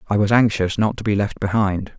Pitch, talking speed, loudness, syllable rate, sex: 105 Hz, 240 wpm, -19 LUFS, 5.7 syllables/s, male